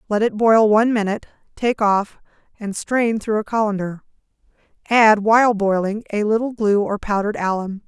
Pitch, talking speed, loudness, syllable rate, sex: 215 Hz, 160 wpm, -18 LUFS, 5.3 syllables/s, female